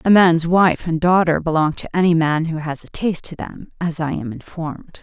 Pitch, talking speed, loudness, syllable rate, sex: 165 Hz, 225 wpm, -18 LUFS, 5.3 syllables/s, female